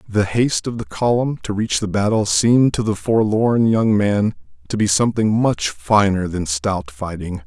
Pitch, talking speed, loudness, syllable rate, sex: 105 Hz, 185 wpm, -18 LUFS, 4.6 syllables/s, male